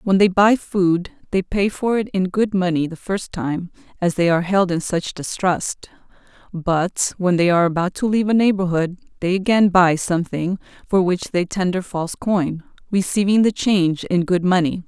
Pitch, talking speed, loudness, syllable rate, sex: 185 Hz, 185 wpm, -19 LUFS, 4.9 syllables/s, female